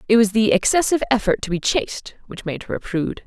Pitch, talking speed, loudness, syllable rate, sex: 215 Hz, 240 wpm, -20 LUFS, 6.6 syllables/s, female